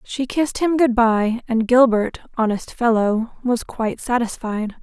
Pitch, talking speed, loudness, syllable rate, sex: 235 Hz, 135 wpm, -19 LUFS, 4.4 syllables/s, female